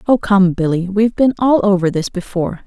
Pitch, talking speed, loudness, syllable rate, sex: 195 Hz, 205 wpm, -15 LUFS, 5.8 syllables/s, female